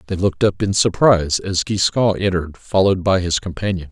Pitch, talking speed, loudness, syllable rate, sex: 95 Hz, 185 wpm, -18 LUFS, 5.9 syllables/s, male